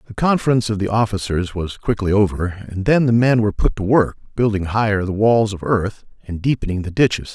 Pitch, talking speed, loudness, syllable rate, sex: 105 Hz, 210 wpm, -18 LUFS, 5.9 syllables/s, male